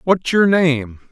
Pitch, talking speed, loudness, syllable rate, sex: 160 Hz, 160 wpm, -16 LUFS, 3.2 syllables/s, male